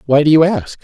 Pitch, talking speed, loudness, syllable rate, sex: 150 Hz, 285 wpm, -12 LUFS, 5.9 syllables/s, male